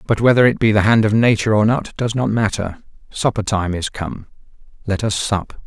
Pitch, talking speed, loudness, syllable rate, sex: 105 Hz, 210 wpm, -17 LUFS, 5.5 syllables/s, male